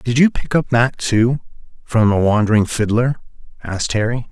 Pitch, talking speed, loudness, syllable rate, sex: 115 Hz, 165 wpm, -17 LUFS, 5.0 syllables/s, male